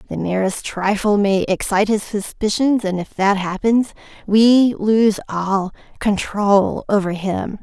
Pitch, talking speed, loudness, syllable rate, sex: 205 Hz, 135 wpm, -18 LUFS, 3.9 syllables/s, female